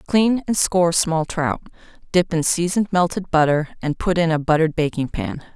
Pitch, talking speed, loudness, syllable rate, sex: 170 Hz, 185 wpm, -20 LUFS, 5.3 syllables/s, female